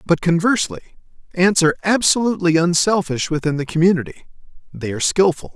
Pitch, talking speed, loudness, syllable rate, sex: 175 Hz, 130 wpm, -17 LUFS, 6.6 syllables/s, male